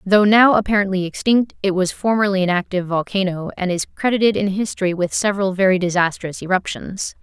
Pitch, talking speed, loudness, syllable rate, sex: 195 Hz, 165 wpm, -18 LUFS, 6.0 syllables/s, female